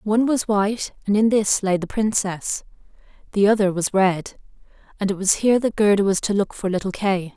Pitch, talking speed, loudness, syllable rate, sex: 200 Hz, 205 wpm, -20 LUFS, 5.4 syllables/s, female